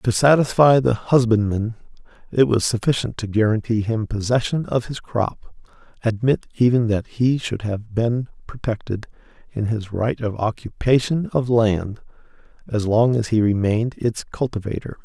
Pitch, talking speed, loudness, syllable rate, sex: 115 Hz, 145 wpm, -20 LUFS, 4.7 syllables/s, male